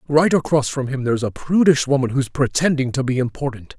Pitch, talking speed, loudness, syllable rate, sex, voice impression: 135 Hz, 205 wpm, -19 LUFS, 5.8 syllables/s, male, masculine, adult-like, powerful, muffled, fluent, raspy, intellectual, unique, slightly wild, slightly lively, slightly sharp, slightly light